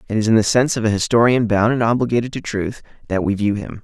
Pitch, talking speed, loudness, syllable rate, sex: 110 Hz, 265 wpm, -18 LUFS, 6.8 syllables/s, male